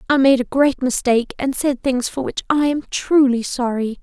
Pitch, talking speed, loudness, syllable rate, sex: 260 Hz, 210 wpm, -18 LUFS, 4.9 syllables/s, female